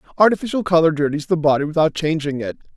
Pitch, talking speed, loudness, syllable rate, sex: 160 Hz, 175 wpm, -18 LUFS, 7.2 syllables/s, male